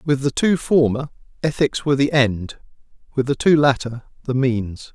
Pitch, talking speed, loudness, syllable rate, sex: 135 Hz, 170 wpm, -19 LUFS, 4.8 syllables/s, male